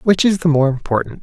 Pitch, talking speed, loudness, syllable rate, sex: 155 Hz, 245 wpm, -16 LUFS, 5.9 syllables/s, male